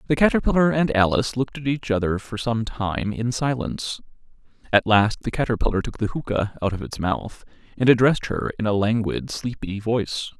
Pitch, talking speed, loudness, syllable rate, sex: 115 Hz, 185 wpm, -22 LUFS, 5.7 syllables/s, male